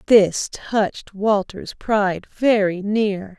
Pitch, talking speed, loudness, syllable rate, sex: 205 Hz, 105 wpm, -20 LUFS, 3.2 syllables/s, female